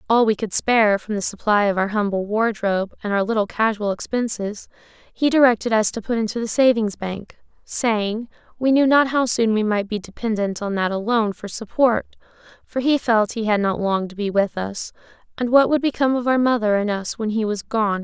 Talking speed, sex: 220 wpm, female